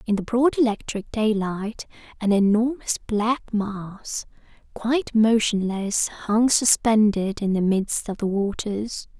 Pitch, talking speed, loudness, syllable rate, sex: 215 Hz, 125 wpm, -22 LUFS, 3.8 syllables/s, female